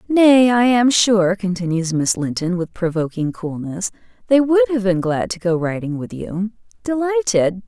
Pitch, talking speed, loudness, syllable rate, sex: 200 Hz, 165 wpm, -18 LUFS, 4.8 syllables/s, female